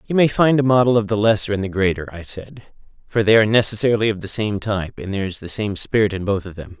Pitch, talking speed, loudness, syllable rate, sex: 105 Hz, 275 wpm, -19 LUFS, 6.6 syllables/s, male